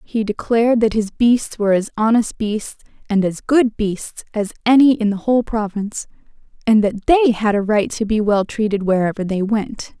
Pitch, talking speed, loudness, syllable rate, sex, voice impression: 215 Hz, 190 wpm, -17 LUFS, 5.1 syllables/s, female, feminine, adult-like, slightly relaxed, slightly powerful, soft, raspy, intellectual, calm, friendly, reassuring, elegant, kind, modest